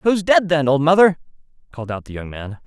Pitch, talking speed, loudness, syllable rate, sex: 145 Hz, 225 wpm, -17 LUFS, 6.1 syllables/s, male